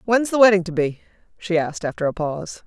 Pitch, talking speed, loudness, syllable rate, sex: 185 Hz, 225 wpm, -20 LUFS, 6.5 syllables/s, female